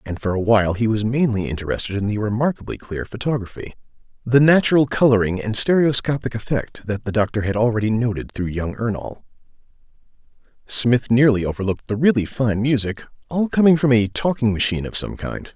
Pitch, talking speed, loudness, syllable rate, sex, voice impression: 115 Hz, 170 wpm, -19 LUFS, 5.9 syllables/s, male, very masculine, adult-like, slightly thick, cool, slightly intellectual, slightly friendly